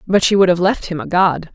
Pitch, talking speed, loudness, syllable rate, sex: 180 Hz, 310 wpm, -15 LUFS, 5.6 syllables/s, female